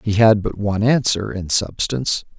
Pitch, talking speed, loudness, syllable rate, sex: 105 Hz, 175 wpm, -18 LUFS, 5.1 syllables/s, male